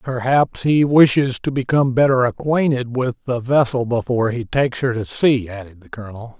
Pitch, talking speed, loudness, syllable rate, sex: 125 Hz, 180 wpm, -18 LUFS, 5.3 syllables/s, male